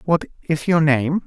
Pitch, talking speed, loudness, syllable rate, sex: 155 Hz, 190 wpm, -19 LUFS, 4.2 syllables/s, male